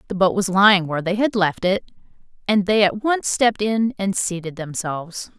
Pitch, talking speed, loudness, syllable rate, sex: 195 Hz, 200 wpm, -19 LUFS, 5.4 syllables/s, female